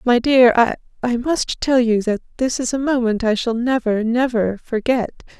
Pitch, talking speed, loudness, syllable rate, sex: 240 Hz, 180 wpm, -18 LUFS, 4.4 syllables/s, female